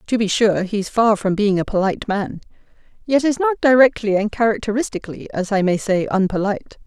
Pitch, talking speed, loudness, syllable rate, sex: 215 Hz, 190 wpm, -18 LUFS, 5.9 syllables/s, female